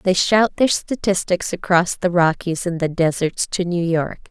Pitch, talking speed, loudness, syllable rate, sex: 180 Hz, 180 wpm, -19 LUFS, 4.3 syllables/s, female